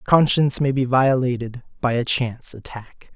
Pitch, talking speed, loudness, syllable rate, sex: 125 Hz, 150 wpm, -20 LUFS, 4.9 syllables/s, male